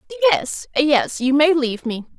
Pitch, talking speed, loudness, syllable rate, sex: 285 Hz, 165 wpm, -18 LUFS, 3.9 syllables/s, female